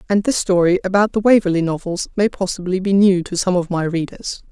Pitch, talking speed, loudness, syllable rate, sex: 185 Hz, 215 wpm, -17 LUFS, 5.8 syllables/s, female